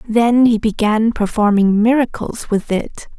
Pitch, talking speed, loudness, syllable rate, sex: 220 Hz, 130 wpm, -15 LUFS, 4.0 syllables/s, female